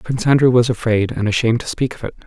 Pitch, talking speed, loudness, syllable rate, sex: 120 Hz, 265 wpm, -17 LUFS, 7.4 syllables/s, male